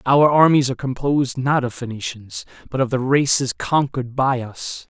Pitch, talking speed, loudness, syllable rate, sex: 130 Hz, 170 wpm, -19 LUFS, 5.0 syllables/s, male